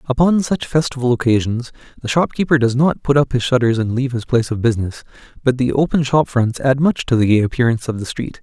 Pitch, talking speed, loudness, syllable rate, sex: 125 Hz, 230 wpm, -17 LUFS, 6.3 syllables/s, male